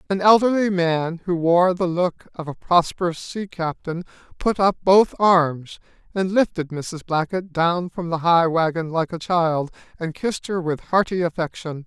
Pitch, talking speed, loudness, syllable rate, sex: 175 Hz, 170 wpm, -21 LUFS, 4.5 syllables/s, male